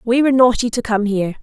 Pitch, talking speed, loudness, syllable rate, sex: 230 Hz, 255 wpm, -16 LUFS, 7.1 syllables/s, female